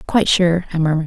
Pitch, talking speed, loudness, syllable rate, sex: 170 Hz, 225 wpm, -16 LUFS, 8.2 syllables/s, female